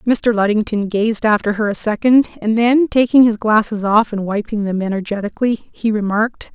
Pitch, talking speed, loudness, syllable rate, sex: 215 Hz, 175 wpm, -16 LUFS, 5.3 syllables/s, female